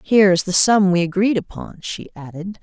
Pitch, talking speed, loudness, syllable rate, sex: 190 Hz, 205 wpm, -16 LUFS, 5.3 syllables/s, female